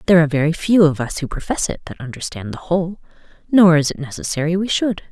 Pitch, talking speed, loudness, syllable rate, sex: 165 Hz, 225 wpm, -18 LUFS, 6.6 syllables/s, female